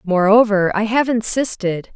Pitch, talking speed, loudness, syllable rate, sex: 210 Hz, 125 wpm, -16 LUFS, 4.4 syllables/s, female